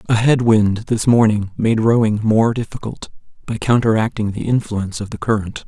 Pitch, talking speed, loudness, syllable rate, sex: 110 Hz, 170 wpm, -17 LUFS, 5.1 syllables/s, male